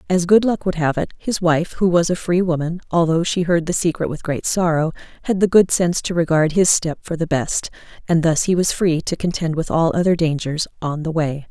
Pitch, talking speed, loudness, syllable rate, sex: 170 Hz, 240 wpm, -19 LUFS, 5.4 syllables/s, female